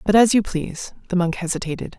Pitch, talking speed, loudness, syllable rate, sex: 185 Hz, 210 wpm, -21 LUFS, 6.4 syllables/s, female